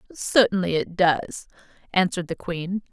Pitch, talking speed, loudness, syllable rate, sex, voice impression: 185 Hz, 125 wpm, -23 LUFS, 4.5 syllables/s, female, feminine, adult-like, tensed, slightly powerful, clear, fluent, intellectual, elegant, lively, slightly strict, sharp